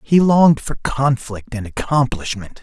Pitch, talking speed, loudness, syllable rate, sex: 130 Hz, 135 wpm, -18 LUFS, 4.4 syllables/s, male